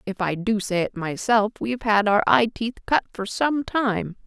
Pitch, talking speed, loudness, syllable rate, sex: 215 Hz, 195 wpm, -22 LUFS, 4.4 syllables/s, female